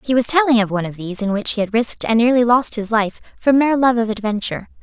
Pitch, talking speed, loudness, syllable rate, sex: 230 Hz, 275 wpm, -17 LUFS, 7.0 syllables/s, female